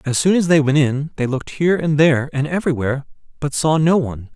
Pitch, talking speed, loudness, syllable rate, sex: 145 Hz, 235 wpm, -18 LUFS, 6.6 syllables/s, male